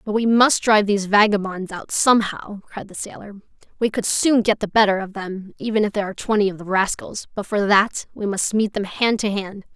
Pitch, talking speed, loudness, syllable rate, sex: 205 Hz, 230 wpm, -20 LUFS, 5.6 syllables/s, female